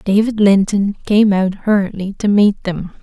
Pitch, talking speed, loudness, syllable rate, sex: 200 Hz, 160 wpm, -15 LUFS, 4.4 syllables/s, female